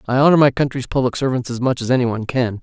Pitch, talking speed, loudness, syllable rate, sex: 125 Hz, 275 wpm, -18 LUFS, 7.3 syllables/s, male